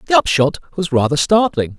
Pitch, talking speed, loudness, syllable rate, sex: 165 Hz, 170 wpm, -16 LUFS, 5.6 syllables/s, male